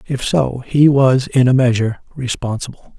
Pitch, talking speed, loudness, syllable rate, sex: 125 Hz, 160 wpm, -15 LUFS, 4.8 syllables/s, male